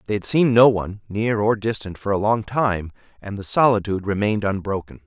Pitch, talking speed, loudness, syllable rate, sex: 105 Hz, 200 wpm, -20 LUFS, 5.8 syllables/s, male